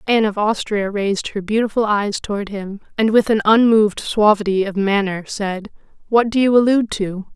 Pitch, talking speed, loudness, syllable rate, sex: 210 Hz, 180 wpm, -17 LUFS, 5.5 syllables/s, female